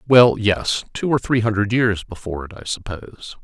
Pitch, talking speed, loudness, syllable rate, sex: 105 Hz, 190 wpm, -19 LUFS, 5.3 syllables/s, male